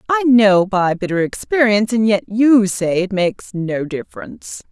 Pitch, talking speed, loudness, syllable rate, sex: 210 Hz, 165 wpm, -16 LUFS, 4.8 syllables/s, female